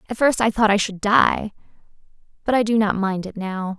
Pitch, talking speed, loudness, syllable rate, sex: 210 Hz, 205 wpm, -20 LUFS, 5.2 syllables/s, female